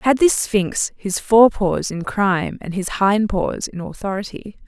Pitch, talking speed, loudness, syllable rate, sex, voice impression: 205 Hz, 180 wpm, -19 LUFS, 4.0 syllables/s, female, feminine, adult-like, tensed, slightly bright, clear, fluent, intellectual, elegant, slightly strict, sharp